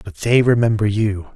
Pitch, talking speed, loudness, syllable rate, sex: 105 Hz, 180 wpm, -17 LUFS, 5.0 syllables/s, male